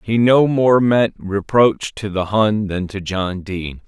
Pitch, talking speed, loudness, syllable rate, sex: 105 Hz, 185 wpm, -17 LUFS, 3.7 syllables/s, male